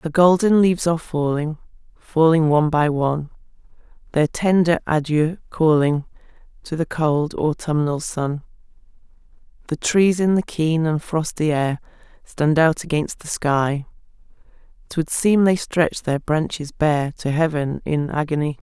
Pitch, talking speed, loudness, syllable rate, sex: 155 Hz, 135 wpm, -20 LUFS, 4.3 syllables/s, female